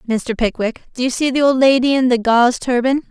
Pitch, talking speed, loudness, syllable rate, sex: 250 Hz, 230 wpm, -16 LUFS, 5.8 syllables/s, female